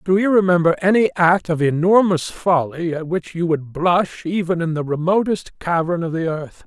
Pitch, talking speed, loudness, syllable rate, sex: 175 Hz, 190 wpm, -18 LUFS, 4.8 syllables/s, male